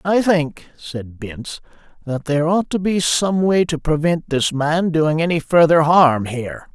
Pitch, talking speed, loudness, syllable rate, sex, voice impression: 160 Hz, 180 wpm, -17 LUFS, 4.3 syllables/s, male, masculine, adult-like, slightly relaxed, powerful, raspy, sincere, mature, wild, strict, intense